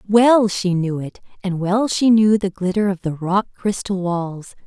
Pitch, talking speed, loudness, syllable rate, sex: 195 Hz, 195 wpm, -18 LUFS, 4.2 syllables/s, female